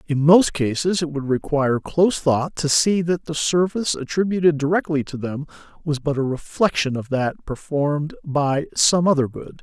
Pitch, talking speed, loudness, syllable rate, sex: 150 Hz, 175 wpm, -20 LUFS, 5.0 syllables/s, male